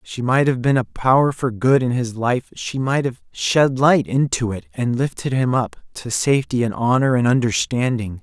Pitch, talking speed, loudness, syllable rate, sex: 125 Hz, 205 wpm, -19 LUFS, 4.7 syllables/s, male